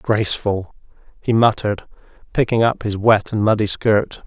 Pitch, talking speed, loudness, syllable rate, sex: 105 Hz, 140 wpm, -18 LUFS, 5.3 syllables/s, male